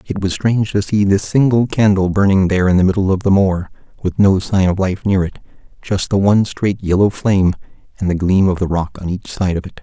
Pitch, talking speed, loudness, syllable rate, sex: 95 Hz, 240 wpm, -16 LUFS, 5.8 syllables/s, male